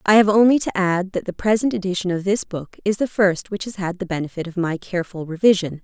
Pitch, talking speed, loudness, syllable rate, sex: 190 Hz, 245 wpm, -20 LUFS, 6.0 syllables/s, female